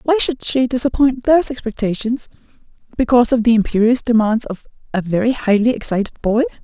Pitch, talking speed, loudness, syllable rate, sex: 240 Hz, 155 wpm, -16 LUFS, 6.0 syllables/s, female